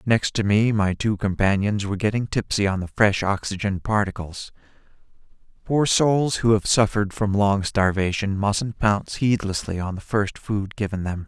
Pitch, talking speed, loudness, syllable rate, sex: 100 Hz, 165 wpm, -22 LUFS, 4.8 syllables/s, male